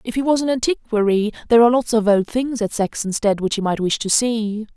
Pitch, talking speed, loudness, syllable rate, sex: 225 Hz, 240 wpm, -19 LUFS, 6.1 syllables/s, female